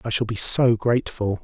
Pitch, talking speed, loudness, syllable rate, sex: 115 Hz, 210 wpm, -19 LUFS, 5.3 syllables/s, male